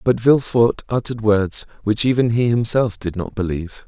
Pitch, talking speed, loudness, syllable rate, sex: 110 Hz, 170 wpm, -18 LUFS, 5.3 syllables/s, male